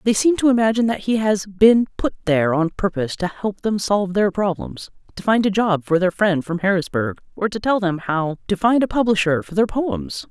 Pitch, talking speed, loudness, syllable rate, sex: 195 Hz, 225 wpm, -19 LUFS, 5.4 syllables/s, female